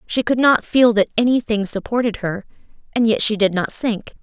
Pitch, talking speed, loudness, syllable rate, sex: 220 Hz, 215 wpm, -18 LUFS, 5.1 syllables/s, female